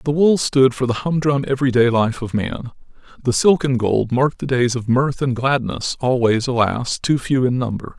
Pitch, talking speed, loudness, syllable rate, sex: 125 Hz, 205 wpm, -18 LUFS, 5.0 syllables/s, male